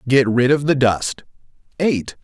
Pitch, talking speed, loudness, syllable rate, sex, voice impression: 130 Hz, 160 wpm, -18 LUFS, 4.0 syllables/s, male, masculine, middle-aged, thick, slightly powerful, fluent, slightly raspy, slightly cool, slightly mature, slightly friendly, unique, wild, lively, kind, slightly strict, slightly sharp